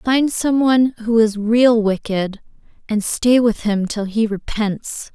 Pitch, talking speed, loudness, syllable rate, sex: 225 Hz, 165 wpm, -17 LUFS, 3.7 syllables/s, female